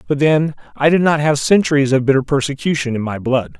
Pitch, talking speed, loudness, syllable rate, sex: 140 Hz, 215 wpm, -16 LUFS, 5.9 syllables/s, male